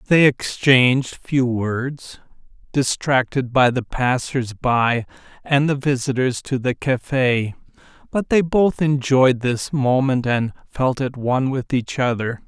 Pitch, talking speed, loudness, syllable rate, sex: 130 Hz, 135 wpm, -19 LUFS, 3.8 syllables/s, male